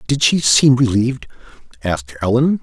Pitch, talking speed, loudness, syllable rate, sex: 125 Hz, 135 wpm, -15 LUFS, 5.4 syllables/s, male